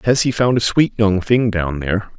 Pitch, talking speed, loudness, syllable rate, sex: 105 Hz, 245 wpm, -17 LUFS, 5.0 syllables/s, male